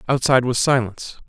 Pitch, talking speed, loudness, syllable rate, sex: 125 Hz, 140 wpm, -18 LUFS, 6.8 syllables/s, male